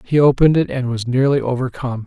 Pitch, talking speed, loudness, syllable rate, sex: 130 Hz, 205 wpm, -17 LUFS, 6.7 syllables/s, male